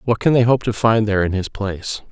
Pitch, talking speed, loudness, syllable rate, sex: 110 Hz, 285 wpm, -18 LUFS, 6.2 syllables/s, male